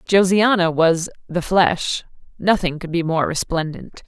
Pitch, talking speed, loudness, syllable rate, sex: 175 Hz, 130 wpm, -19 LUFS, 4.0 syllables/s, female